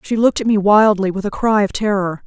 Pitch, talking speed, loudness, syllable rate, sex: 205 Hz, 265 wpm, -16 LUFS, 6.0 syllables/s, female